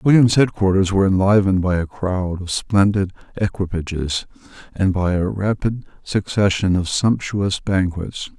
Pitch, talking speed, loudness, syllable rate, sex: 95 Hz, 130 wpm, -19 LUFS, 4.6 syllables/s, male